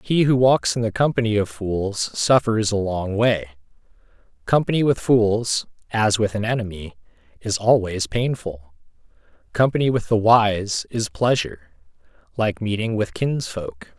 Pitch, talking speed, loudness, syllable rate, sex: 110 Hz, 135 wpm, -21 LUFS, 4.4 syllables/s, male